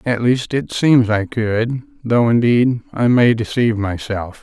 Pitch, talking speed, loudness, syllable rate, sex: 120 Hz, 165 wpm, -16 LUFS, 4.0 syllables/s, male